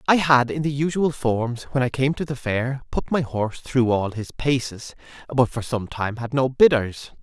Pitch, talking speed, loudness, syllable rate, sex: 125 Hz, 215 wpm, -22 LUFS, 4.6 syllables/s, male